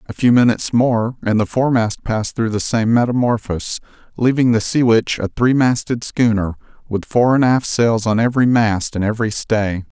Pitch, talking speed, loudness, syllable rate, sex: 115 Hz, 185 wpm, -17 LUFS, 5.3 syllables/s, male